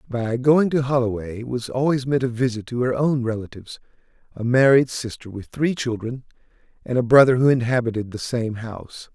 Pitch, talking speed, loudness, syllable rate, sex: 125 Hz, 170 wpm, -21 LUFS, 5.4 syllables/s, male